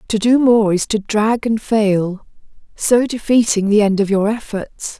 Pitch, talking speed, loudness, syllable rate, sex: 215 Hz, 180 wpm, -16 LUFS, 4.2 syllables/s, female